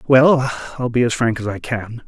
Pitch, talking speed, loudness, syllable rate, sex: 120 Hz, 230 wpm, -18 LUFS, 4.9 syllables/s, male